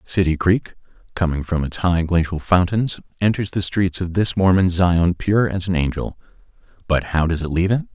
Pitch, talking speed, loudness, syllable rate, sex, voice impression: 90 Hz, 190 wpm, -19 LUFS, 5.1 syllables/s, male, masculine, adult-like, thick, slightly tensed, dark, slightly muffled, cool, intellectual, slightly mature, reassuring, wild, modest